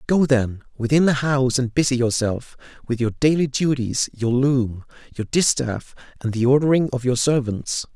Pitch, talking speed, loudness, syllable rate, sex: 125 Hz, 165 wpm, -20 LUFS, 4.8 syllables/s, male